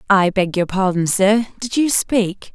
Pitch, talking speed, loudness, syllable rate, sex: 200 Hz, 190 wpm, -17 LUFS, 4.0 syllables/s, female